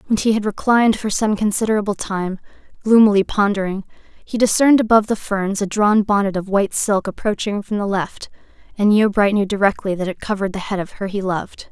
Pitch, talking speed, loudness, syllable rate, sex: 205 Hz, 195 wpm, -18 LUFS, 6.0 syllables/s, female